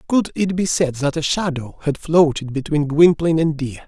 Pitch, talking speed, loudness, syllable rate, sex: 155 Hz, 200 wpm, -18 LUFS, 5.1 syllables/s, male